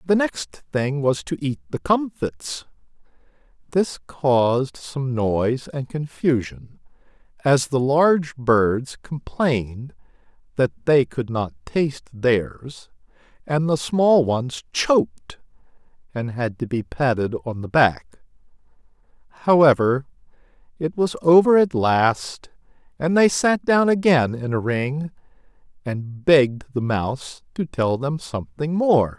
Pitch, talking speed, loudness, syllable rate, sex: 135 Hz, 125 wpm, -21 LUFS, 3.7 syllables/s, male